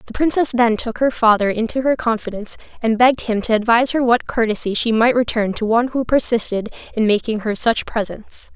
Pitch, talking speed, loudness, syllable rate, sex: 230 Hz, 205 wpm, -18 LUFS, 5.8 syllables/s, female